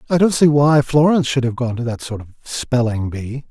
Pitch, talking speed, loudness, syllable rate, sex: 130 Hz, 240 wpm, -17 LUFS, 5.4 syllables/s, male